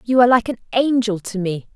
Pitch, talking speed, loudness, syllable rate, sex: 225 Hz, 240 wpm, -18 LUFS, 6.1 syllables/s, female